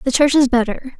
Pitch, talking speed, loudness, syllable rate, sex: 260 Hz, 240 wpm, -16 LUFS, 6.0 syllables/s, female